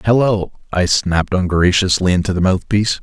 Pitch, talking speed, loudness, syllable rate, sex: 95 Hz, 140 wpm, -16 LUFS, 5.4 syllables/s, male